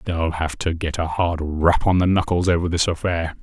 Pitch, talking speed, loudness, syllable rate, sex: 85 Hz, 225 wpm, -21 LUFS, 5.0 syllables/s, male